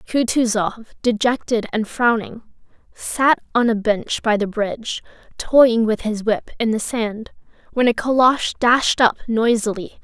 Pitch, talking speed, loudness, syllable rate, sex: 230 Hz, 145 wpm, -19 LUFS, 4.1 syllables/s, female